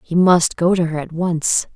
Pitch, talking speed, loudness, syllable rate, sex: 170 Hz, 240 wpm, -17 LUFS, 4.4 syllables/s, female